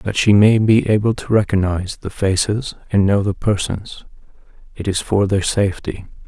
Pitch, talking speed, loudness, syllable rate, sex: 100 Hz, 170 wpm, -17 LUFS, 5.0 syllables/s, male